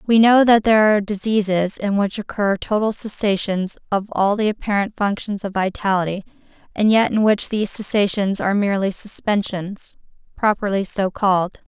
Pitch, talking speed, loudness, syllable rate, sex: 200 Hz, 155 wpm, -19 LUFS, 5.3 syllables/s, female